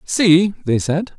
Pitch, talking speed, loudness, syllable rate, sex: 175 Hz, 150 wpm, -16 LUFS, 3.2 syllables/s, male